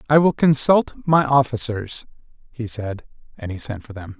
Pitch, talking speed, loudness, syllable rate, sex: 120 Hz, 170 wpm, -20 LUFS, 4.8 syllables/s, male